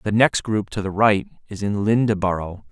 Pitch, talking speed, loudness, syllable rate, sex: 105 Hz, 200 wpm, -21 LUFS, 5.1 syllables/s, male